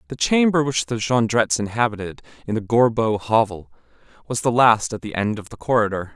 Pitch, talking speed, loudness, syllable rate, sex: 110 Hz, 185 wpm, -20 LUFS, 5.6 syllables/s, male